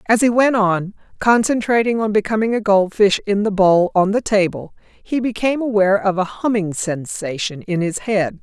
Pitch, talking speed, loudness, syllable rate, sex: 205 Hz, 180 wpm, -17 LUFS, 5.0 syllables/s, female